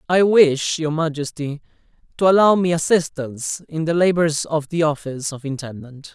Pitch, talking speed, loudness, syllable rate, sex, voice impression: 155 Hz, 155 wpm, -19 LUFS, 5.0 syllables/s, male, masculine, adult-like, tensed, powerful, hard, slightly raspy, cool, calm, slightly mature, friendly, wild, strict, slightly sharp